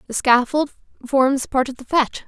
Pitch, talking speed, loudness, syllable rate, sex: 265 Hz, 185 wpm, -19 LUFS, 5.2 syllables/s, female